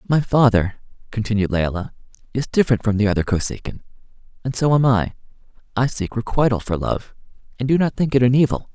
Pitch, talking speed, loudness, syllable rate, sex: 120 Hz, 180 wpm, -20 LUFS, 6.0 syllables/s, male